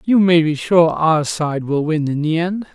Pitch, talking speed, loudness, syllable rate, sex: 165 Hz, 240 wpm, -16 LUFS, 4.3 syllables/s, male